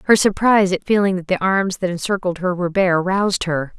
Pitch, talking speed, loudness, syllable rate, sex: 185 Hz, 220 wpm, -18 LUFS, 5.8 syllables/s, female